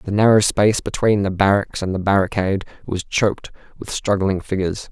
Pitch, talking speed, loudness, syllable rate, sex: 100 Hz, 170 wpm, -19 LUFS, 5.7 syllables/s, male